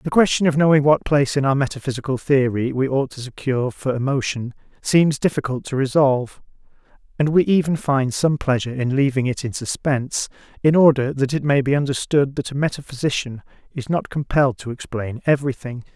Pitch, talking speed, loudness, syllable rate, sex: 135 Hz, 175 wpm, -20 LUFS, 5.8 syllables/s, male